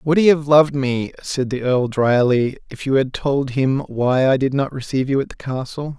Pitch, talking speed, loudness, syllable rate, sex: 135 Hz, 230 wpm, -19 LUFS, 5.0 syllables/s, male